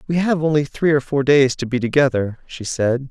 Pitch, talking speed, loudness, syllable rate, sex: 140 Hz, 230 wpm, -18 LUFS, 5.2 syllables/s, male